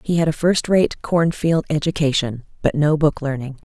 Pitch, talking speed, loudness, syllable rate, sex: 155 Hz, 195 wpm, -19 LUFS, 4.9 syllables/s, female